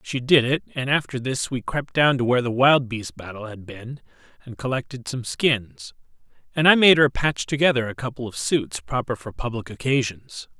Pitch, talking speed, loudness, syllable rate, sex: 125 Hz, 200 wpm, -21 LUFS, 5.1 syllables/s, male